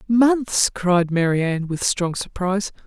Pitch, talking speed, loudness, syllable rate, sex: 190 Hz, 125 wpm, -20 LUFS, 3.9 syllables/s, female